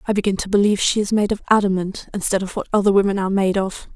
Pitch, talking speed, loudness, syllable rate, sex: 200 Hz, 260 wpm, -19 LUFS, 7.2 syllables/s, female